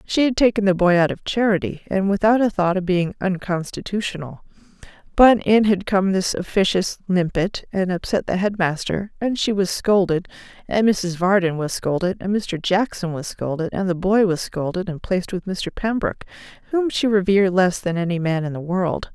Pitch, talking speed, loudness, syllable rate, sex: 190 Hz, 190 wpm, -20 LUFS, 5.1 syllables/s, female